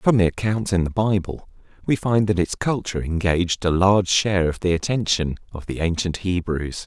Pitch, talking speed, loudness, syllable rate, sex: 95 Hz, 190 wpm, -21 LUFS, 5.4 syllables/s, male